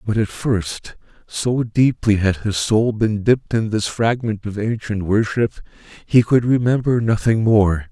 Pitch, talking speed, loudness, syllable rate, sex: 110 Hz, 160 wpm, -18 LUFS, 4.2 syllables/s, male